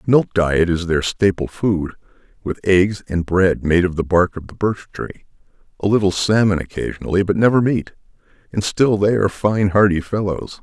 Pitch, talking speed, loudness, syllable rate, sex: 95 Hz, 180 wpm, -18 LUFS, 5.1 syllables/s, male